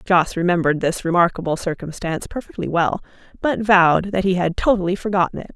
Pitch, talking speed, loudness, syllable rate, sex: 180 Hz, 160 wpm, -19 LUFS, 6.1 syllables/s, female